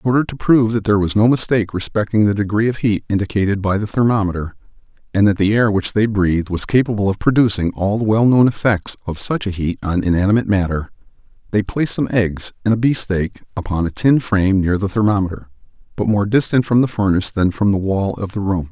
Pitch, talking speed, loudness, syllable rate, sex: 105 Hz, 220 wpm, -17 LUFS, 6.3 syllables/s, male